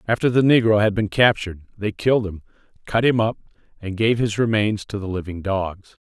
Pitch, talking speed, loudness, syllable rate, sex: 105 Hz, 195 wpm, -20 LUFS, 5.6 syllables/s, male